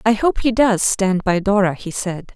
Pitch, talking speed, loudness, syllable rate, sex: 205 Hz, 230 wpm, -18 LUFS, 4.4 syllables/s, female